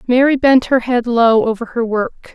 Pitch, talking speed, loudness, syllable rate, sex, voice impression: 245 Hz, 205 wpm, -14 LUFS, 4.6 syllables/s, female, feminine, adult-like, slightly relaxed, slightly bright, soft, muffled, intellectual, friendly, elegant, kind